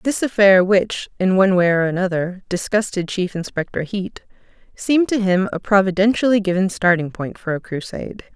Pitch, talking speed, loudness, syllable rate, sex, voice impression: 190 Hz, 165 wpm, -18 LUFS, 5.3 syllables/s, female, very feminine, very adult-like, middle-aged, slightly thin, slightly tensed, slightly powerful, slightly dark, very hard, very clear, very fluent, very cool, very intellectual, slightly refreshing, very sincere, very calm, slightly friendly, very reassuring, unique, very elegant, very strict, slightly intense, very sharp